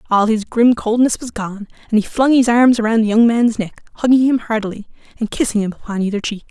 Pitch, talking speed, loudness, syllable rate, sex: 225 Hz, 230 wpm, -16 LUFS, 6.0 syllables/s, female